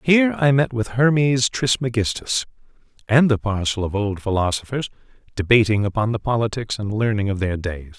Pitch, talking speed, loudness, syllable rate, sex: 115 Hz, 160 wpm, -20 LUFS, 5.4 syllables/s, male